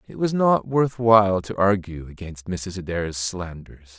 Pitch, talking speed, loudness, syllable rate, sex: 95 Hz, 165 wpm, -21 LUFS, 4.1 syllables/s, male